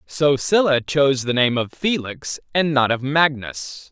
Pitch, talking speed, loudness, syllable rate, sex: 135 Hz, 170 wpm, -19 LUFS, 4.1 syllables/s, male